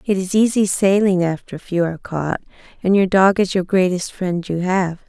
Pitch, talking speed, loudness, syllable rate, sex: 185 Hz, 215 wpm, -18 LUFS, 5.1 syllables/s, female